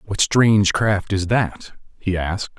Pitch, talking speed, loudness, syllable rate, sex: 100 Hz, 165 wpm, -19 LUFS, 4.0 syllables/s, male